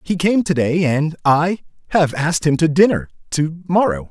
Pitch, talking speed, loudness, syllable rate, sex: 160 Hz, 175 wpm, -17 LUFS, 4.8 syllables/s, male